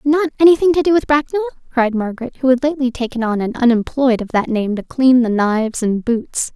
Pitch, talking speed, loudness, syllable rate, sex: 255 Hz, 220 wpm, -16 LUFS, 5.9 syllables/s, female